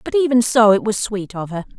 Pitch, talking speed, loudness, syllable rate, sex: 220 Hz, 270 wpm, -17 LUFS, 5.7 syllables/s, female